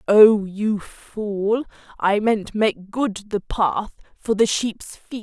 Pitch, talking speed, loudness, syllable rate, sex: 210 Hz, 150 wpm, -21 LUFS, 2.8 syllables/s, female